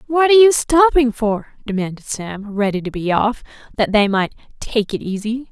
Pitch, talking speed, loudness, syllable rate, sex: 230 Hz, 185 wpm, -17 LUFS, 5.0 syllables/s, female